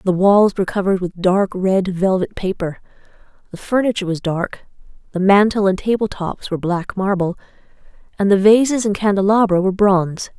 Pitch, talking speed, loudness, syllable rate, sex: 195 Hz, 160 wpm, -17 LUFS, 5.6 syllables/s, female